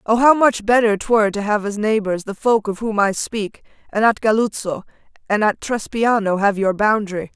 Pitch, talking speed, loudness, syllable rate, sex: 215 Hz, 195 wpm, -18 LUFS, 5.1 syllables/s, female